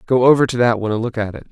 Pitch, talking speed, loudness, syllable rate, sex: 120 Hz, 355 wpm, -16 LUFS, 8.2 syllables/s, male